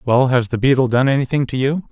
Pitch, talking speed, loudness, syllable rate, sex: 130 Hz, 250 wpm, -17 LUFS, 6.2 syllables/s, male